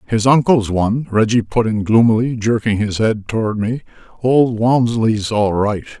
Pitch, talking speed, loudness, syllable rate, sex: 110 Hz, 160 wpm, -16 LUFS, 4.6 syllables/s, male